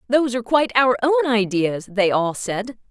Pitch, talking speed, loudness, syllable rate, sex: 235 Hz, 185 wpm, -19 LUFS, 5.5 syllables/s, female